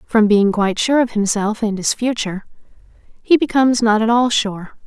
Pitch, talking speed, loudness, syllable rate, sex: 220 Hz, 185 wpm, -16 LUFS, 5.2 syllables/s, female